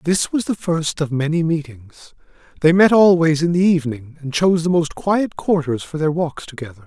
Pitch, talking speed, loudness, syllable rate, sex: 160 Hz, 200 wpm, -18 LUFS, 5.2 syllables/s, male